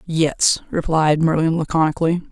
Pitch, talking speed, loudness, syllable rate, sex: 160 Hz, 105 wpm, -18 LUFS, 4.9 syllables/s, female